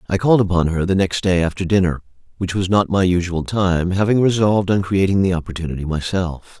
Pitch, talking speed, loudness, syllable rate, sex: 95 Hz, 200 wpm, -18 LUFS, 6.0 syllables/s, male